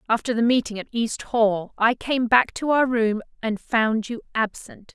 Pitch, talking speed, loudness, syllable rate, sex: 230 Hz, 195 wpm, -22 LUFS, 4.4 syllables/s, female